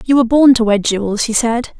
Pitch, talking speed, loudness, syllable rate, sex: 235 Hz, 265 wpm, -13 LUFS, 6.0 syllables/s, female